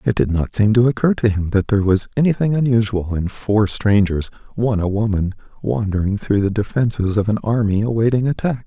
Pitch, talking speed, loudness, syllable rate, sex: 110 Hz, 195 wpm, -18 LUFS, 5.7 syllables/s, male